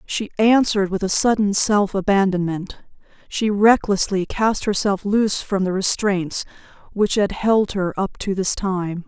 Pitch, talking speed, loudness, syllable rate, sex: 200 Hz, 150 wpm, -19 LUFS, 4.3 syllables/s, female